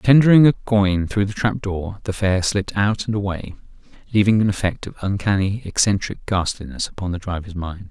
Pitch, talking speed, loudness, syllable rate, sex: 100 Hz, 180 wpm, -20 LUFS, 5.3 syllables/s, male